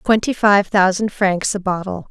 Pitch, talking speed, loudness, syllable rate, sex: 195 Hz, 170 wpm, -17 LUFS, 4.5 syllables/s, female